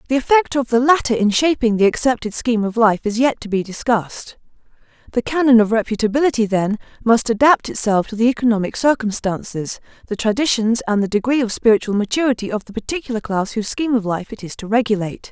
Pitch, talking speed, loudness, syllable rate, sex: 230 Hz, 190 wpm, -18 LUFS, 6.3 syllables/s, female